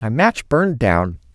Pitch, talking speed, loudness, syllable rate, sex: 130 Hz, 180 wpm, -17 LUFS, 4.2 syllables/s, male